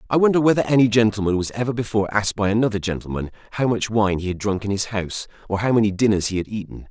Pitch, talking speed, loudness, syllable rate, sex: 105 Hz, 245 wpm, -21 LUFS, 7.2 syllables/s, male